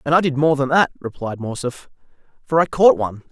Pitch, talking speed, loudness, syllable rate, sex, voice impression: 140 Hz, 215 wpm, -18 LUFS, 5.9 syllables/s, male, very masculine, young, adult-like, slightly thick, tensed, slightly powerful, very bright, slightly hard, very clear, slightly halting, cool, slightly intellectual, very refreshing, sincere, calm, very friendly, lively, slightly kind, slightly light